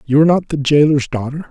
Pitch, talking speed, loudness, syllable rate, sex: 145 Hz, 240 wpm, -15 LUFS, 6.6 syllables/s, male